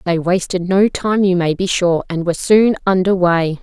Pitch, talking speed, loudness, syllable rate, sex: 180 Hz, 215 wpm, -15 LUFS, 4.8 syllables/s, female